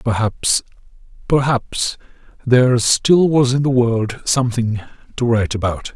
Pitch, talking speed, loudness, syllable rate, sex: 120 Hz, 120 wpm, -17 LUFS, 4.3 syllables/s, male